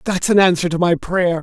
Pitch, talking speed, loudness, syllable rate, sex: 175 Hz, 255 wpm, -16 LUFS, 5.4 syllables/s, male